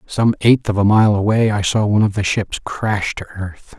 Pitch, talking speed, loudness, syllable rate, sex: 105 Hz, 240 wpm, -16 LUFS, 4.9 syllables/s, male